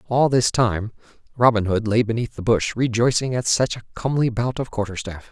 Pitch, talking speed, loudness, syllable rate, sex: 115 Hz, 190 wpm, -21 LUFS, 5.5 syllables/s, male